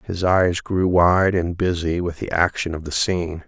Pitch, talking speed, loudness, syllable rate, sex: 85 Hz, 205 wpm, -20 LUFS, 4.5 syllables/s, male